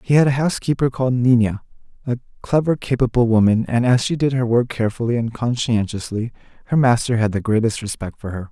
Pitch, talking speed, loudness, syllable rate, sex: 120 Hz, 190 wpm, -19 LUFS, 6.1 syllables/s, male